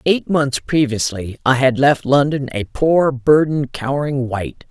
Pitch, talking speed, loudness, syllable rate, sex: 135 Hz, 155 wpm, -17 LUFS, 4.2 syllables/s, female